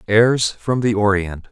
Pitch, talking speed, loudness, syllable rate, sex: 110 Hz, 160 wpm, -17 LUFS, 3.7 syllables/s, male